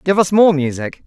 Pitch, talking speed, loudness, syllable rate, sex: 165 Hz, 225 wpm, -14 LUFS, 5.2 syllables/s, male